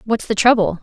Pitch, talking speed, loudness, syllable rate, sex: 215 Hz, 220 wpm, -15 LUFS, 5.7 syllables/s, female